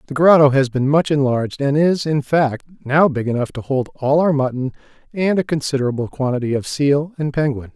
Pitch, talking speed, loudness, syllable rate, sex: 140 Hz, 200 wpm, -18 LUFS, 5.4 syllables/s, male